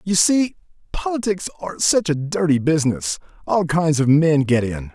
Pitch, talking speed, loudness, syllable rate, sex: 160 Hz, 160 wpm, -19 LUFS, 4.9 syllables/s, male